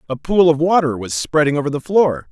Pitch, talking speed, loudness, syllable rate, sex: 150 Hz, 235 wpm, -16 LUFS, 5.6 syllables/s, male